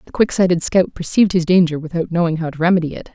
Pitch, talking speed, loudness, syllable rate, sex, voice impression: 170 Hz, 250 wpm, -17 LUFS, 7.0 syllables/s, female, very feminine, very adult-like, middle-aged, very thin, slightly relaxed, slightly powerful, bright, slightly hard, very clear, very fluent, slightly cute, cool, very intellectual, refreshing, sincere, calm, friendly, reassuring, slightly unique, very elegant, slightly wild, sweet, very lively, strict, slightly intense, sharp, light